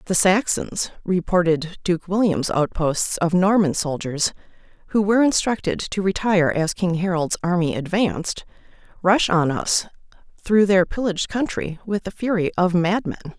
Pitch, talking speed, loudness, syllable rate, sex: 185 Hz, 140 wpm, -21 LUFS, 4.7 syllables/s, female